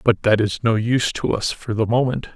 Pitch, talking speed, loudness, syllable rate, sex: 115 Hz, 255 wpm, -20 LUFS, 5.4 syllables/s, male